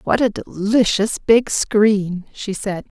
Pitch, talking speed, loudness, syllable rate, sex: 210 Hz, 140 wpm, -18 LUFS, 3.3 syllables/s, female